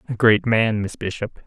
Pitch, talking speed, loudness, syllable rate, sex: 110 Hz, 205 wpm, -20 LUFS, 4.7 syllables/s, male